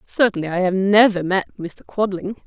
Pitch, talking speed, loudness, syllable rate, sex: 195 Hz, 170 wpm, -18 LUFS, 5.3 syllables/s, female